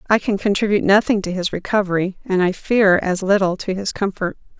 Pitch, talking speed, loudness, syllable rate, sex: 195 Hz, 195 wpm, -18 LUFS, 5.8 syllables/s, female